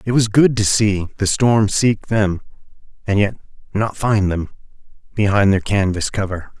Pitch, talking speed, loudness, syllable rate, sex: 105 Hz, 155 wpm, -17 LUFS, 4.5 syllables/s, male